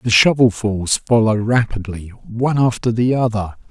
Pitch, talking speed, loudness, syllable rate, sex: 110 Hz, 130 wpm, -17 LUFS, 4.5 syllables/s, male